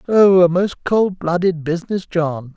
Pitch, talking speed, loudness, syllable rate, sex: 175 Hz, 165 wpm, -17 LUFS, 4.2 syllables/s, male